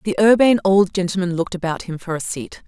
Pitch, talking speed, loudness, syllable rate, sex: 185 Hz, 225 wpm, -18 LUFS, 6.5 syllables/s, female